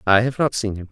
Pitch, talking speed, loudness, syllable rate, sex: 110 Hz, 330 wpm, -20 LUFS, 6.3 syllables/s, male